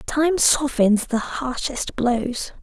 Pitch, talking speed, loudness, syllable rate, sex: 260 Hz, 115 wpm, -21 LUFS, 2.9 syllables/s, female